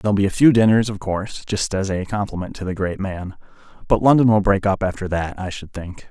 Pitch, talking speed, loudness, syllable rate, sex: 100 Hz, 235 wpm, -19 LUFS, 5.8 syllables/s, male